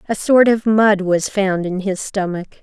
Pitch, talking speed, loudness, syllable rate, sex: 200 Hz, 205 wpm, -16 LUFS, 4.3 syllables/s, female